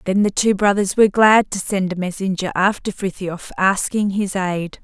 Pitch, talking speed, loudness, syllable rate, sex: 195 Hz, 185 wpm, -18 LUFS, 4.8 syllables/s, female